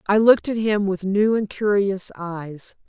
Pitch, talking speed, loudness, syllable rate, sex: 200 Hz, 190 wpm, -20 LUFS, 4.2 syllables/s, female